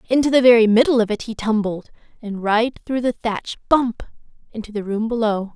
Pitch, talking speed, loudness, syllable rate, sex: 225 Hz, 175 wpm, -19 LUFS, 5.4 syllables/s, female